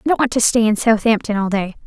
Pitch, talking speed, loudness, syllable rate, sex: 220 Hz, 290 wpm, -16 LUFS, 6.8 syllables/s, female